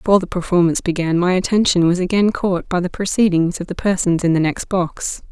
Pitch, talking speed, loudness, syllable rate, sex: 180 Hz, 215 wpm, -17 LUFS, 6.0 syllables/s, female